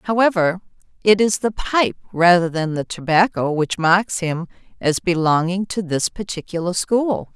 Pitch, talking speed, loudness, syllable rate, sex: 185 Hz, 145 wpm, -19 LUFS, 4.4 syllables/s, female